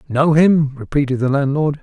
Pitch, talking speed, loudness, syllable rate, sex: 145 Hz, 165 wpm, -16 LUFS, 4.8 syllables/s, male